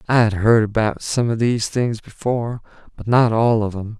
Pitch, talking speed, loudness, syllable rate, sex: 115 Hz, 210 wpm, -19 LUFS, 5.2 syllables/s, male